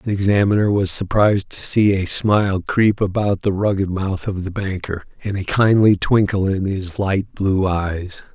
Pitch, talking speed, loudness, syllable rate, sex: 100 Hz, 180 wpm, -18 LUFS, 4.5 syllables/s, male